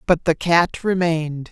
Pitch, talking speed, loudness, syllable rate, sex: 170 Hz, 160 wpm, -19 LUFS, 4.4 syllables/s, female